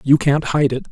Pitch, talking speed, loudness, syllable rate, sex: 140 Hz, 260 wpm, -17 LUFS, 5.3 syllables/s, male